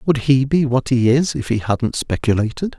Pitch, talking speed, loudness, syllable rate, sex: 130 Hz, 215 wpm, -18 LUFS, 4.7 syllables/s, male